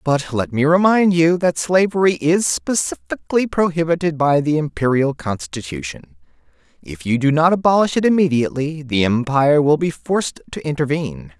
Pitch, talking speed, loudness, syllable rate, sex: 150 Hz, 145 wpm, -17 LUFS, 5.3 syllables/s, male